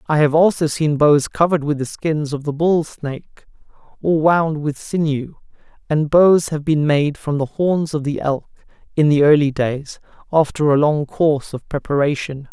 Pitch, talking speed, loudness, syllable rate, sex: 150 Hz, 180 wpm, -18 LUFS, 4.6 syllables/s, male